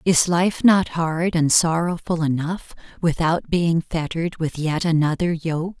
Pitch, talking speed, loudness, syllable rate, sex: 165 Hz, 145 wpm, -20 LUFS, 4.1 syllables/s, female